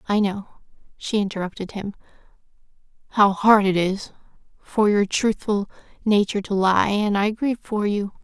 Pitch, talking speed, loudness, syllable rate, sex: 205 Hz, 145 wpm, -21 LUFS, 4.9 syllables/s, female